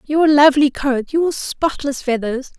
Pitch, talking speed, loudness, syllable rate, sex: 280 Hz, 140 wpm, -16 LUFS, 4.2 syllables/s, female